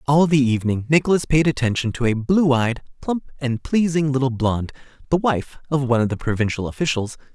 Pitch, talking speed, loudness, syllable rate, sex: 135 Hz, 190 wpm, -20 LUFS, 5.9 syllables/s, male